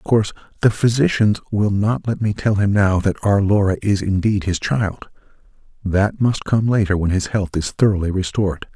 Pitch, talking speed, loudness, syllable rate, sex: 100 Hz, 185 wpm, -18 LUFS, 5.1 syllables/s, male